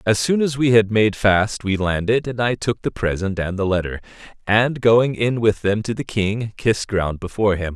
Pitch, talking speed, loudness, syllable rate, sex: 110 Hz, 225 wpm, -19 LUFS, 4.9 syllables/s, male